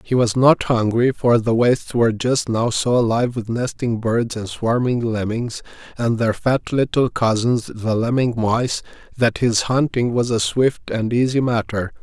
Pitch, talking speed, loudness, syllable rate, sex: 120 Hz, 175 wpm, -19 LUFS, 4.4 syllables/s, male